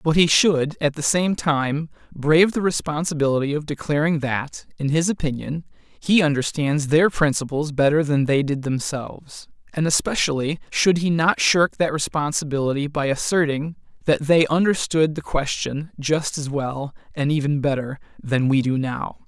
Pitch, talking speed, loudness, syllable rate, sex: 150 Hz, 155 wpm, -21 LUFS, 4.7 syllables/s, male